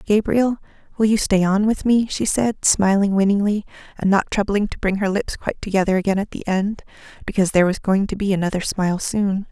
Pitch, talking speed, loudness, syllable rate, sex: 200 Hz, 210 wpm, -19 LUFS, 5.9 syllables/s, female